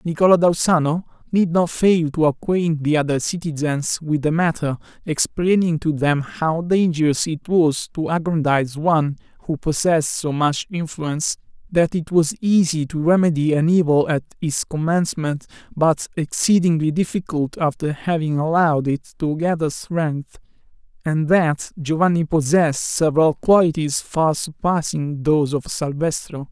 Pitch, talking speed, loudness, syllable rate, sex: 160 Hz, 140 wpm, -19 LUFS, 4.7 syllables/s, male